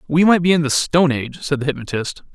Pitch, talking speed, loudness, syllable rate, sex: 150 Hz, 255 wpm, -17 LUFS, 6.6 syllables/s, male